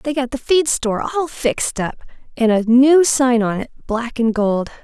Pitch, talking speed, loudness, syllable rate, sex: 250 Hz, 210 wpm, -17 LUFS, 4.6 syllables/s, female